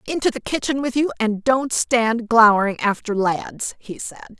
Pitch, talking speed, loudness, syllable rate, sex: 235 Hz, 175 wpm, -19 LUFS, 4.6 syllables/s, female